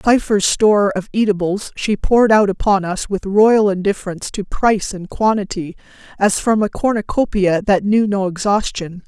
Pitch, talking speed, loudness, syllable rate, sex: 200 Hz, 160 wpm, -16 LUFS, 5.0 syllables/s, female